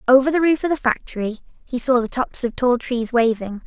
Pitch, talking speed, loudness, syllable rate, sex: 250 Hz, 230 wpm, -20 LUFS, 5.6 syllables/s, female